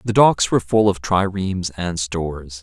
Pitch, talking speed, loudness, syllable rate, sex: 95 Hz, 185 wpm, -19 LUFS, 4.7 syllables/s, male